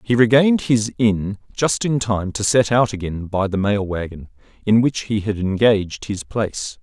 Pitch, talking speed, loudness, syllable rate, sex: 105 Hz, 195 wpm, -19 LUFS, 4.7 syllables/s, male